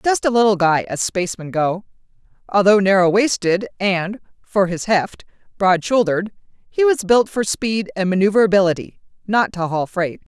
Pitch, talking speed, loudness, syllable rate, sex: 195 Hz, 155 wpm, -18 LUFS, 5.1 syllables/s, female